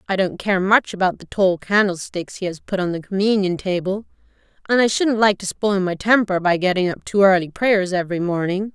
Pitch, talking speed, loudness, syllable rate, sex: 190 Hz, 215 wpm, -19 LUFS, 5.4 syllables/s, female